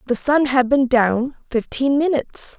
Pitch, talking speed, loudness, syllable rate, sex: 265 Hz, 160 wpm, -18 LUFS, 4.4 syllables/s, female